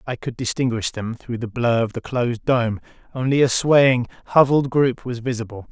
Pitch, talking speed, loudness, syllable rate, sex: 120 Hz, 180 wpm, -20 LUFS, 5.1 syllables/s, male